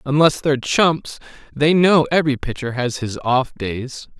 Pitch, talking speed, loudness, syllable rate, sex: 140 Hz, 155 wpm, -18 LUFS, 4.4 syllables/s, male